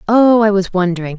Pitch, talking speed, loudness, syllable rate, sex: 200 Hz, 205 wpm, -13 LUFS, 5.9 syllables/s, female